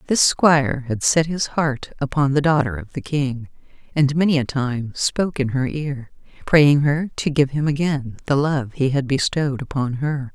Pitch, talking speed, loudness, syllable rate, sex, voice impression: 140 Hz, 190 wpm, -20 LUFS, 4.6 syllables/s, female, feminine, adult-like, slightly intellectual, calm, elegant